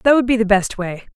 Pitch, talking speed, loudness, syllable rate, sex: 220 Hz, 315 wpm, -17 LUFS, 5.7 syllables/s, female